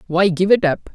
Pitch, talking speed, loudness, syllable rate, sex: 185 Hz, 255 wpm, -16 LUFS, 5.1 syllables/s, male